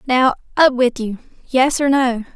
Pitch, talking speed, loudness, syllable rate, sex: 255 Hz, 180 wpm, -17 LUFS, 4.3 syllables/s, female